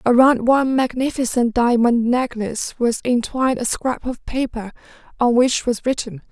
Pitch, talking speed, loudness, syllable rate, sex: 245 Hz, 145 wpm, -19 LUFS, 4.9 syllables/s, female